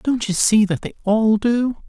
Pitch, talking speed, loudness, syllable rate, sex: 220 Hz, 225 wpm, -18 LUFS, 4.1 syllables/s, male